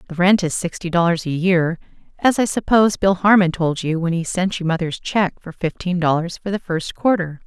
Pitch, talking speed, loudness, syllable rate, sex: 175 Hz, 215 wpm, -19 LUFS, 5.4 syllables/s, female